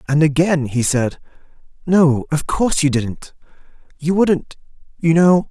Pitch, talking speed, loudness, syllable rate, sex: 155 Hz, 140 wpm, -17 LUFS, 4.2 syllables/s, male